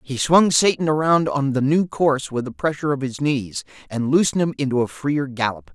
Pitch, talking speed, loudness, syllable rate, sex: 135 Hz, 220 wpm, -20 LUFS, 5.4 syllables/s, male